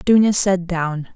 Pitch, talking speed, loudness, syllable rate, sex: 180 Hz, 155 wpm, -18 LUFS, 3.7 syllables/s, female